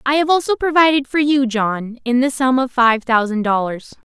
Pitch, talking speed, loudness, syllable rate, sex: 255 Hz, 205 wpm, -16 LUFS, 5.0 syllables/s, female